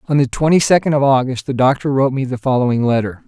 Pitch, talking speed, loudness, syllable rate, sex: 130 Hz, 240 wpm, -15 LUFS, 6.7 syllables/s, male